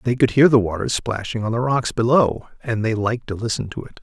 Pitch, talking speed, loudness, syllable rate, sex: 115 Hz, 255 wpm, -20 LUFS, 5.8 syllables/s, male